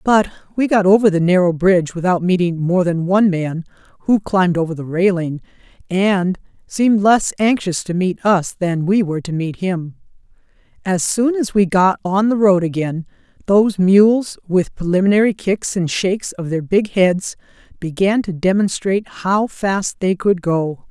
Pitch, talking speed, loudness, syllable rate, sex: 185 Hz, 170 wpm, -17 LUFS, 4.7 syllables/s, female